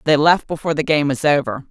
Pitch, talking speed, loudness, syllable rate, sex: 145 Hz, 245 wpm, -17 LUFS, 6.4 syllables/s, female